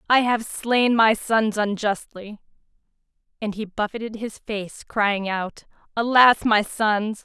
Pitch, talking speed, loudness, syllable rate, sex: 215 Hz, 135 wpm, -21 LUFS, 3.8 syllables/s, female